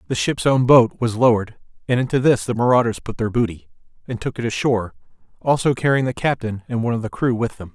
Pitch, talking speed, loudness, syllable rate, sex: 120 Hz, 225 wpm, -19 LUFS, 6.4 syllables/s, male